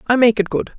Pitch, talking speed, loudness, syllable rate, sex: 220 Hz, 305 wpm, -16 LUFS, 6.5 syllables/s, female